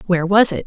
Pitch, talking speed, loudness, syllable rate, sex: 190 Hz, 270 wpm, -15 LUFS, 7.8 syllables/s, female